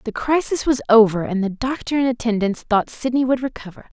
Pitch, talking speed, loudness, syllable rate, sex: 235 Hz, 195 wpm, -19 LUFS, 5.9 syllables/s, female